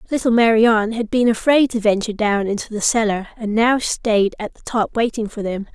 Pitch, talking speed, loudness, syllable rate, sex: 220 Hz, 210 wpm, -18 LUFS, 5.5 syllables/s, female